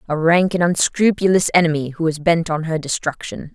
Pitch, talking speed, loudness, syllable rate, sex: 165 Hz, 185 wpm, -17 LUFS, 5.3 syllables/s, female